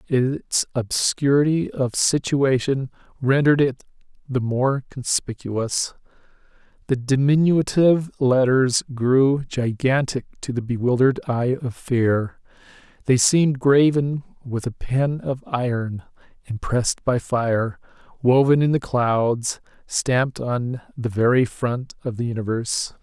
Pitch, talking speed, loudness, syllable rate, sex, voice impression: 130 Hz, 110 wpm, -21 LUFS, 4.0 syllables/s, male, masculine, adult-like, fluent, sincere, slightly calm, reassuring